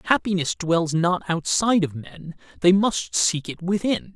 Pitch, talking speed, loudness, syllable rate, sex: 180 Hz, 160 wpm, -22 LUFS, 4.4 syllables/s, male